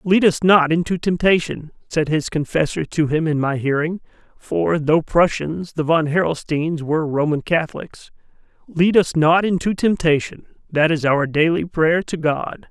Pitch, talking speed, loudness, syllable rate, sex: 160 Hz, 155 wpm, -19 LUFS, 3.4 syllables/s, male